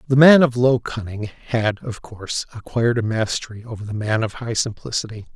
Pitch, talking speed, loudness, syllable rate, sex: 115 Hz, 190 wpm, -20 LUFS, 5.4 syllables/s, male